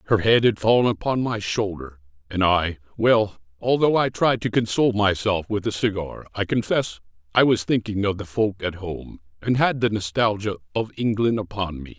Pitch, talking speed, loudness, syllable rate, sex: 105 Hz, 180 wpm, -22 LUFS, 5.0 syllables/s, male